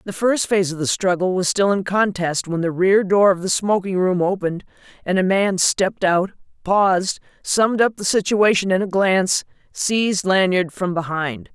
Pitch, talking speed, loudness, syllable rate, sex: 190 Hz, 185 wpm, -19 LUFS, 5.0 syllables/s, female